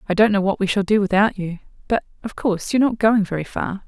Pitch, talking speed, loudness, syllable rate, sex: 200 Hz, 265 wpm, -20 LUFS, 6.6 syllables/s, female